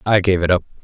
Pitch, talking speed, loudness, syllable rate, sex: 90 Hz, 290 wpm, -17 LUFS, 7.3 syllables/s, male